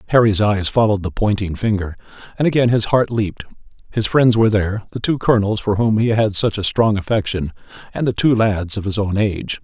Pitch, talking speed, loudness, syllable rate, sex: 105 Hz, 210 wpm, -17 LUFS, 6.0 syllables/s, male